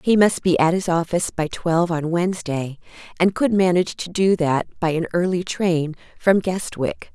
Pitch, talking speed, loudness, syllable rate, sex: 175 Hz, 185 wpm, -20 LUFS, 4.9 syllables/s, female